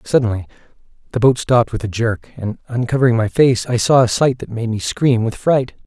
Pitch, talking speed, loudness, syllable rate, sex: 120 Hz, 215 wpm, -17 LUFS, 5.5 syllables/s, male